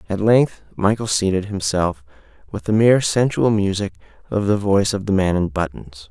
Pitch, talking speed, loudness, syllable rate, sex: 100 Hz, 175 wpm, -19 LUFS, 5.2 syllables/s, male